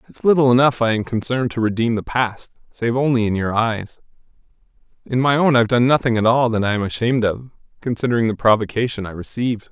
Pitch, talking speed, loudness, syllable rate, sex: 115 Hz, 205 wpm, -18 LUFS, 6.4 syllables/s, male